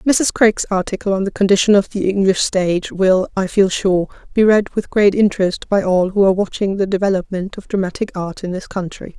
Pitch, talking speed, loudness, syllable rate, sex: 195 Hz, 210 wpm, -17 LUFS, 5.5 syllables/s, female